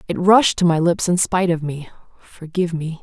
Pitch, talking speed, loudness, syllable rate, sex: 170 Hz, 220 wpm, -18 LUFS, 5.4 syllables/s, female